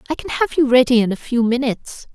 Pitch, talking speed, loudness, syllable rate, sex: 250 Hz, 250 wpm, -17 LUFS, 6.7 syllables/s, female